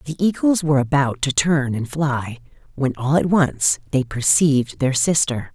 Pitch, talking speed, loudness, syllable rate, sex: 140 Hz, 175 wpm, -19 LUFS, 4.5 syllables/s, female